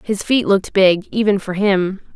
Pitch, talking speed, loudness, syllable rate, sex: 200 Hz, 195 wpm, -16 LUFS, 4.7 syllables/s, female